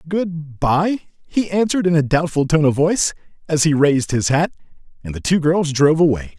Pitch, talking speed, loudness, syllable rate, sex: 155 Hz, 195 wpm, -18 LUFS, 5.5 syllables/s, male